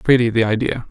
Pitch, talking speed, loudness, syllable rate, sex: 115 Hz, 200 wpm, -17 LUFS, 6.2 syllables/s, male